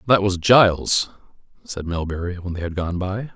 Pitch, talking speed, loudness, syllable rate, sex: 95 Hz, 180 wpm, -20 LUFS, 5.0 syllables/s, male